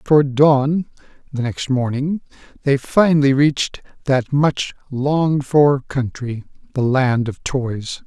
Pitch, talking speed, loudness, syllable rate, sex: 135 Hz, 125 wpm, -18 LUFS, 3.8 syllables/s, male